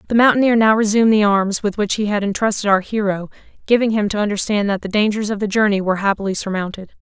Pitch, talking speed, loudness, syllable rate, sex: 205 Hz, 220 wpm, -17 LUFS, 6.7 syllables/s, female